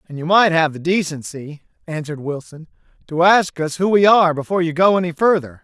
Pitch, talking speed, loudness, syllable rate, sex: 165 Hz, 200 wpm, -17 LUFS, 6.0 syllables/s, male